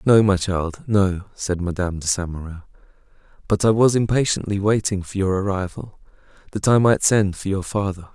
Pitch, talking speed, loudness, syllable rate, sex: 100 Hz, 175 wpm, -20 LUFS, 5.2 syllables/s, male